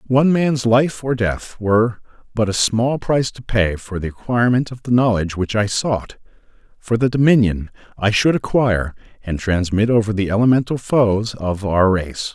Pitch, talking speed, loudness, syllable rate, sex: 110 Hz, 175 wpm, -18 LUFS, 4.9 syllables/s, male